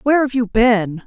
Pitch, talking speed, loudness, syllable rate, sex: 230 Hz, 225 wpm, -16 LUFS, 5.2 syllables/s, female